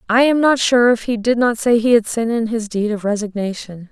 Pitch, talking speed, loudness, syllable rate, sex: 225 Hz, 260 wpm, -16 LUFS, 5.4 syllables/s, female